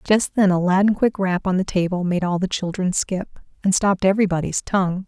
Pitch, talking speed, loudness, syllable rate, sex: 190 Hz, 225 wpm, -20 LUFS, 5.7 syllables/s, female